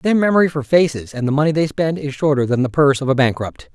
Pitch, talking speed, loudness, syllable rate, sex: 145 Hz, 270 wpm, -17 LUFS, 6.5 syllables/s, male